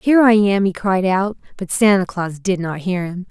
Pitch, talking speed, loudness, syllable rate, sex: 190 Hz, 235 wpm, -17 LUFS, 4.9 syllables/s, female